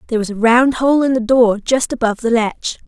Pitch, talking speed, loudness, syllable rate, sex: 235 Hz, 250 wpm, -15 LUFS, 5.7 syllables/s, female